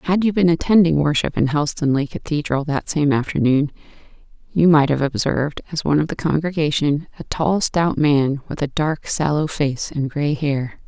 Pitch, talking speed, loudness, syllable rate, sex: 150 Hz, 175 wpm, -19 LUFS, 5.0 syllables/s, female